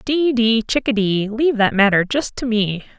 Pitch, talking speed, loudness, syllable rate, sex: 225 Hz, 180 wpm, -17 LUFS, 4.9 syllables/s, female